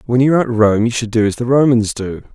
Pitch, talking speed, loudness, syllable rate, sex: 120 Hz, 305 wpm, -14 LUFS, 6.6 syllables/s, male